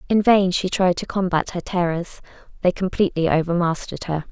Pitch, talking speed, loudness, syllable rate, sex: 180 Hz, 155 wpm, -21 LUFS, 5.7 syllables/s, female